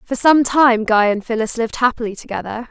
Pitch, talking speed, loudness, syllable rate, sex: 235 Hz, 200 wpm, -16 LUFS, 5.8 syllables/s, female